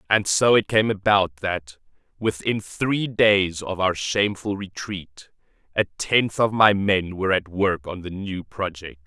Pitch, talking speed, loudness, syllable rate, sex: 95 Hz, 165 wpm, -22 LUFS, 4.0 syllables/s, male